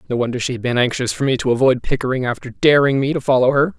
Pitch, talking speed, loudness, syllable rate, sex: 125 Hz, 270 wpm, -17 LUFS, 6.9 syllables/s, male